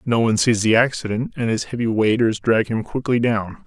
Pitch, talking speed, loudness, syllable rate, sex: 115 Hz, 215 wpm, -19 LUFS, 5.4 syllables/s, male